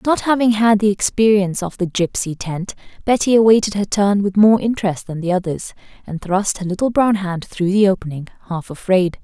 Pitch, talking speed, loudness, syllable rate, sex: 200 Hz, 195 wpm, -17 LUFS, 5.4 syllables/s, female